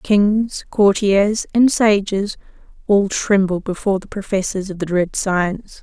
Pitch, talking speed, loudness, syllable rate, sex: 200 Hz, 135 wpm, -17 LUFS, 4.1 syllables/s, female